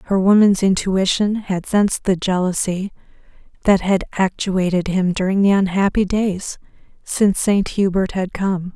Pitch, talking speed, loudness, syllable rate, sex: 190 Hz, 135 wpm, -18 LUFS, 4.5 syllables/s, female